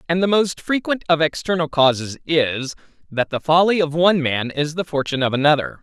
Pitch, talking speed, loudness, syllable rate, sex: 160 Hz, 195 wpm, -19 LUFS, 5.6 syllables/s, male